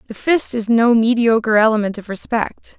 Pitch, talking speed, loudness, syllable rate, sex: 225 Hz, 170 wpm, -16 LUFS, 5.0 syllables/s, female